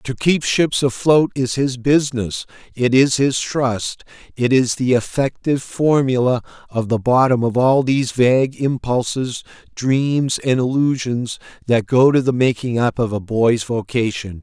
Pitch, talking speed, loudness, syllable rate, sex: 125 Hz, 155 wpm, -18 LUFS, 4.3 syllables/s, male